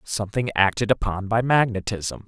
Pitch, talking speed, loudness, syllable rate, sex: 105 Hz, 130 wpm, -22 LUFS, 5.2 syllables/s, male